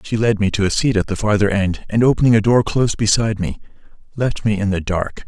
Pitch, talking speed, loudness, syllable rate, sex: 105 Hz, 250 wpm, -17 LUFS, 6.1 syllables/s, male